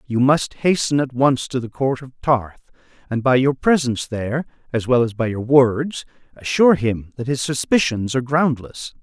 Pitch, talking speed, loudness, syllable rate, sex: 130 Hz, 185 wpm, -19 LUFS, 4.9 syllables/s, male